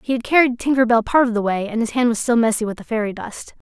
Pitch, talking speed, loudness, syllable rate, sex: 235 Hz, 305 wpm, -18 LUFS, 6.6 syllables/s, female